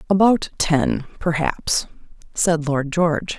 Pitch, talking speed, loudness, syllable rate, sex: 165 Hz, 105 wpm, -20 LUFS, 3.6 syllables/s, female